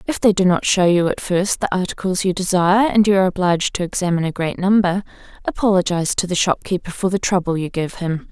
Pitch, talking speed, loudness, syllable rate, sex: 185 Hz, 225 wpm, -18 LUFS, 6.3 syllables/s, female